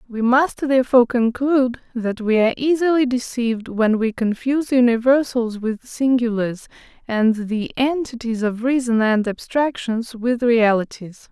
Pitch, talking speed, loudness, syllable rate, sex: 240 Hz, 125 wpm, -19 LUFS, 4.6 syllables/s, female